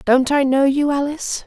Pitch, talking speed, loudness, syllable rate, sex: 275 Hz, 205 wpm, -17 LUFS, 5.1 syllables/s, female